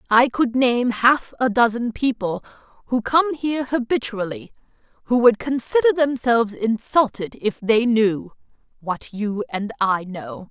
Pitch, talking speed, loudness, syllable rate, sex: 235 Hz, 130 wpm, -20 LUFS, 4.3 syllables/s, female